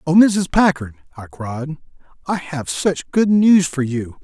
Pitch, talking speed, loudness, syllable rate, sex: 155 Hz, 170 wpm, -17 LUFS, 3.9 syllables/s, male